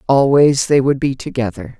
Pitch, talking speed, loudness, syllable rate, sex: 135 Hz, 165 wpm, -15 LUFS, 4.9 syllables/s, female